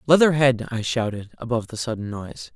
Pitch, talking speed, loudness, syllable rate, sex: 120 Hz, 165 wpm, -22 LUFS, 6.1 syllables/s, male